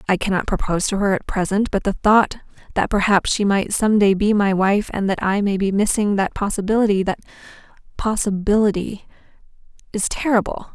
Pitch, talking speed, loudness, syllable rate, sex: 200 Hz, 170 wpm, -19 LUFS, 5.6 syllables/s, female